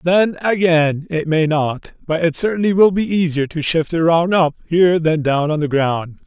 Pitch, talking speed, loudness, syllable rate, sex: 165 Hz, 200 wpm, -16 LUFS, 4.7 syllables/s, male